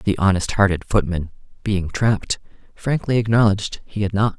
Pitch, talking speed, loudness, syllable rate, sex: 100 Hz, 150 wpm, -20 LUFS, 5.4 syllables/s, male